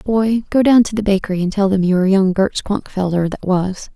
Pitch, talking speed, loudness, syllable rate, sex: 200 Hz, 245 wpm, -16 LUFS, 5.6 syllables/s, female